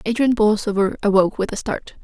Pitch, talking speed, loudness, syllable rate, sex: 210 Hz, 175 wpm, -19 LUFS, 6.2 syllables/s, female